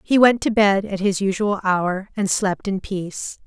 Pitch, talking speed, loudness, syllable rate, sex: 195 Hz, 210 wpm, -20 LUFS, 4.4 syllables/s, female